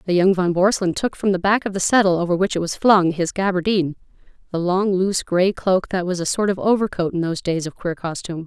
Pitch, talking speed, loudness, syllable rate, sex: 185 Hz, 240 wpm, -20 LUFS, 6.2 syllables/s, female